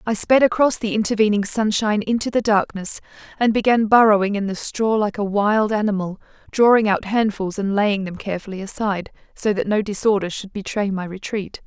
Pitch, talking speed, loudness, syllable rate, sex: 210 Hz, 180 wpm, -20 LUFS, 5.6 syllables/s, female